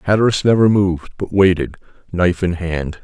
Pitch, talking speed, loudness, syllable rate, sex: 90 Hz, 160 wpm, -16 LUFS, 5.7 syllables/s, male